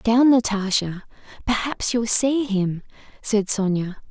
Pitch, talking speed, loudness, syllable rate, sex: 220 Hz, 130 wpm, -21 LUFS, 4.1 syllables/s, female